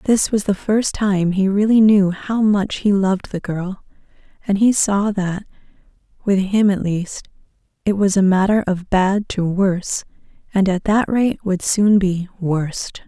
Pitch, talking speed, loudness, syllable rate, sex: 195 Hz, 170 wpm, -18 LUFS, 4.1 syllables/s, female